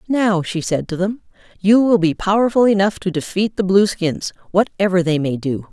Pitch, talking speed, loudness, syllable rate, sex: 190 Hz, 190 wpm, -17 LUFS, 5.0 syllables/s, female